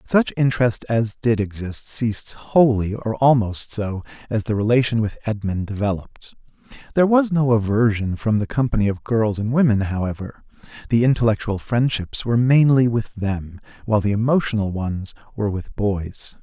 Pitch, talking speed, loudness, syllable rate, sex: 110 Hz, 155 wpm, -20 LUFS, 5.1 syllables/s, male